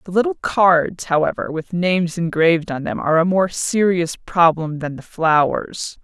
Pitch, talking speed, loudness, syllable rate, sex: 170 Hz, 170 wpm, -18 LUFS, 4.6 syllables/s, female